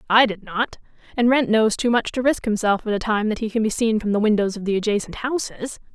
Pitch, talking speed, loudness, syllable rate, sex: 220 Hz, 260 wpm, -21 LUFS, 5.9 syllables/s, female